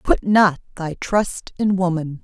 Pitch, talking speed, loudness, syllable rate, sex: 180 Hz, 160 wpm, -20 LUFS, 3.7 syllables/s, female